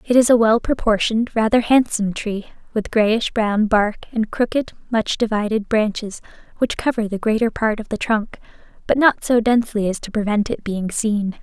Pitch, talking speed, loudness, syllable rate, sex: 220 Hz, 185 wpm, -19 LUFS, 5.1 syllables/s, female